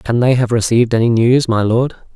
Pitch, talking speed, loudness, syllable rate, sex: 120 Hz, 225 wpm, -14 LUFS, 5.7 syllables/s, male